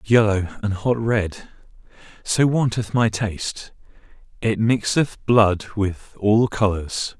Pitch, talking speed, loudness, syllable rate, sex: 105 Hz, 110 wpm, -21 LUFS, 3.8 syllables/s, male